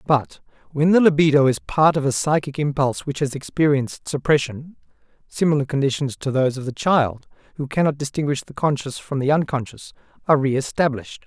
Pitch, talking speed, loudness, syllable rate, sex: 145 Hz, 165 wpm, -20 LUFS, 5.8 syllables/s, male